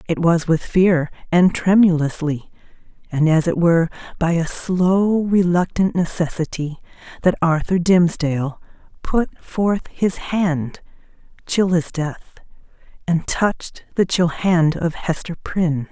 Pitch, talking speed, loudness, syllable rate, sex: 170 Hz, 125 wpm, -19 LUFS, 4.1 syllables/s, female